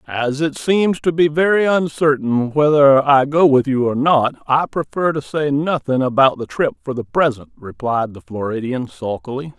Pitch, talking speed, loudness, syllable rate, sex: 140 Hz, 180 wpm, -17 LUFS, 4.6 syllables/s, male